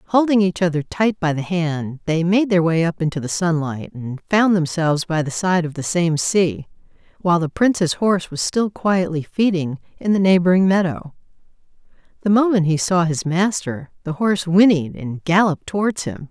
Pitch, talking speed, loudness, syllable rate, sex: 175 Hz, 185 wpm, -19 LUFS, 5.1 syllables/s, female